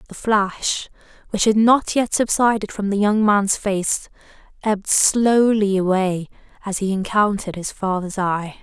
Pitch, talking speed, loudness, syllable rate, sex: 205 Hz, 145 wpm, -19 LUFS, 4.2 syllables/s, female